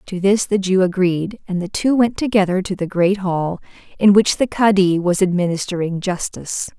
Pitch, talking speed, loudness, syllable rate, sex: 190 Hz, 185 wpm, -18 LUFS, 5.0 syllables/s, female